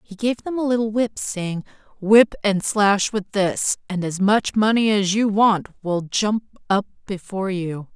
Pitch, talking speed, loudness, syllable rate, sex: 205 Hz, 180 wpm, -20 LUFS, 4.1 syllables/s, female